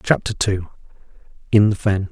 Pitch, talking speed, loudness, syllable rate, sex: 100 Hz, 115 wpm, -19 LUFS, 5.0 syllables/s, male